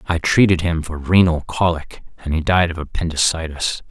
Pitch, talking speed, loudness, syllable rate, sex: 85 Hz, 170 wpm, -18 LUFS, 5.2 syllables/s, male